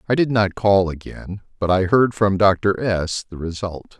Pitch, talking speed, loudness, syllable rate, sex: 100 Hz, 195 wpm, -19 LUFS, 4.2 syllables/s, male